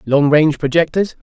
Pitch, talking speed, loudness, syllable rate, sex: 155 Hz, 135 wpm, -15 LUFS, 5.6 syllables/s, male